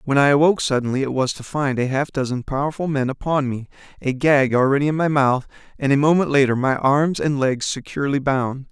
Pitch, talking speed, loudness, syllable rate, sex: 140 Hz, 215 wpm, -20 LUFS, 5.8 syllables/s, male